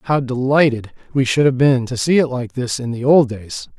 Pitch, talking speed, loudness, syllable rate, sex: 130 Hz, 240 wpm, -17 LUFS, 4.9 syllables/s, male